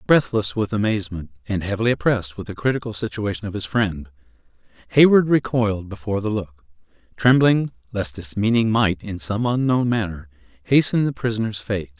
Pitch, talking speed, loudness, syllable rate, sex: 105 Hz, 155 wpm, -21 LUFS, 5.6 syllables/s, male